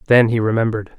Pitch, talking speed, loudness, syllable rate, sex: 110 Hz, 180 wpm, -17 LUFS, 7.4 syllables/s, male